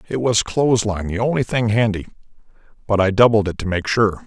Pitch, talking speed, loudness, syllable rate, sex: 105 Hz, 210 wpm, -18 LUFS, 5.7 syllables/s, male